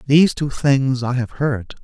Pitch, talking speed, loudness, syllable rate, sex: 130 Hz, 195 wpm, -18 LUFS, 4.4 syllables/s, male